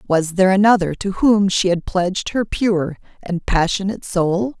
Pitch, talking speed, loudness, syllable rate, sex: 190 Hz, 170 wpm, -18 LUFS, 4.8 syllables/s, female